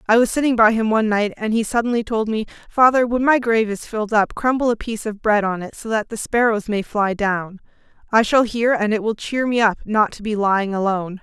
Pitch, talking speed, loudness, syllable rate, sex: 220 Hz, 250 wpm, -19 LUFS, 5.9 syllables/s, female